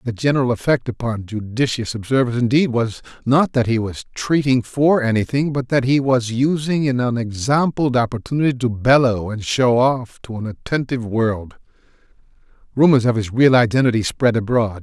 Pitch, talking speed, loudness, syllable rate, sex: 125 Hz, 160 wpm, -18 LUFS, 5.1 syllables/s, male